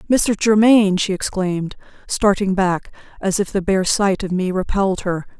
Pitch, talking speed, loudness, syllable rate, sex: 195 Hz, 165 wpm, -18 LUFS, 5.0 syllables/s, female